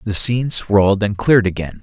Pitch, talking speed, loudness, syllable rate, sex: 105 Hz, 195 wpm, -15 LUFS, 5.9 syllables/s, male